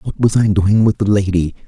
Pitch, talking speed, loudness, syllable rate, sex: 100 Hz, 250 wpm, -15 LUFS, 5.2 syllables/s, male